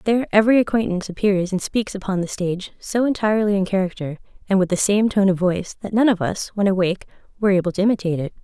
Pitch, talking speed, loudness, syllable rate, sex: 195 Hz, 220 wpm, -20 LUFS, 7.2 syllables/s, female